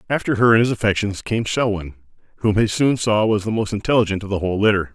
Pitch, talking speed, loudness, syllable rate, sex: 110 Hz, 230 wpm, -19 LUFS, 6.5 syllables/s, male